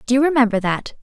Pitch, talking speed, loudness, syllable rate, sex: 245 Hz, 235 wpm, -17 LUFS, 7.1 syllables/s, female